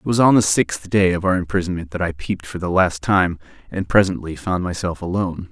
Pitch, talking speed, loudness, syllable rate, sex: 90 Hz, 230 wpm, -19 LUFS, 5.8 syllables/s, male